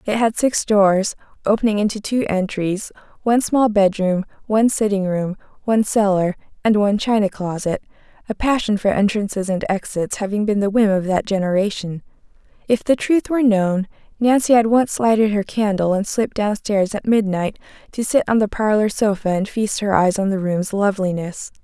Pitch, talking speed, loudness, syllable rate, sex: 205 Hz, 175 wpm, -19 LUFS, 5.3 syllables/s, female